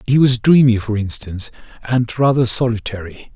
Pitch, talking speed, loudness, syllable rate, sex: 115 Hz, 145 wpm, -16 LUFS, 5.2 syllables/s, male